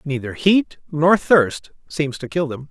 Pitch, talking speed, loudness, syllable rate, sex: 150 Hz, 175 wpm, -18 LUFS, 3.9 syllables/s, male